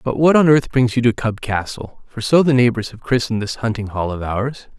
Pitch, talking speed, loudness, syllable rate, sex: 120 Hz, 240 wpm, -18 LUFS, 5.5 syllables/s, male